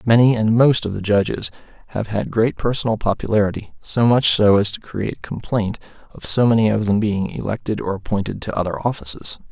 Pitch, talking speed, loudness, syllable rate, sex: 105 Hz, 185 wpm, -19 LUFS, 5.7 syllables/s, male